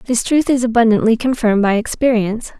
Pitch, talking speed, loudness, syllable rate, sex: 230 Hz, 160 wpm, -15 LUFS, 6.3 syllables/s, female